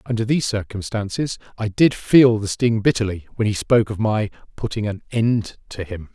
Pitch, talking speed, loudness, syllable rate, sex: 110 Hz, 185 wpm, -20 LUFS, 5.3 syllables/s, male